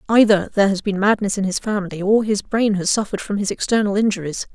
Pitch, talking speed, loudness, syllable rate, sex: 205 Hz, 225 wpm, -19 LUFS, 6.5 syllables/s, female